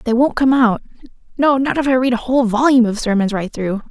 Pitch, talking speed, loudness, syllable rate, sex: 240 Hz, 230 wpm, -16 LUFS, 6.3 syllables/s, female